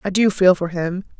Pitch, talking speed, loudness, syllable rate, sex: 185 Hz, 250 wpm, -18 LUFS, 5.1 syllables/s, female